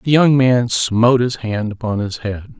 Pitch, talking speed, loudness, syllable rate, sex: 115 Hz, 210 wpm, -16 LUFS, 4.6 syllables/s, male